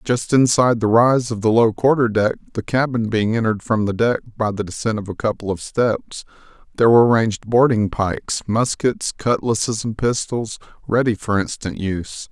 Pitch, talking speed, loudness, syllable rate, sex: 110 Hz, 170 wpm, -19 LUFS, 5.2 syllables/s, male